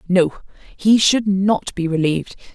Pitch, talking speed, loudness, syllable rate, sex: 190 Hz, 140 wpm, -18 LUFS, 4.2 syllables/s, female